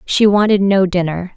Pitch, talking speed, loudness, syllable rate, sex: 190 Hz, 175 wpm, -14 LUFS, 4.9 syllables/s, female